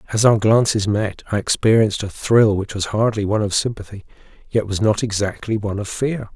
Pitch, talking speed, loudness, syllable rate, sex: 105 Hz, 200 wpm, -19 LUFS, 5.8 syllables/s, male